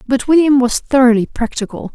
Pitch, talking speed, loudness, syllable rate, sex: 255 Hz, 155 wpm, -13 LUFS, 5.7 syllables/s, female